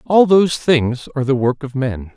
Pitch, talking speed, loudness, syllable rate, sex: 140 Hz, 220 wpm, -16 LUFS, 5.1 syllables/s, male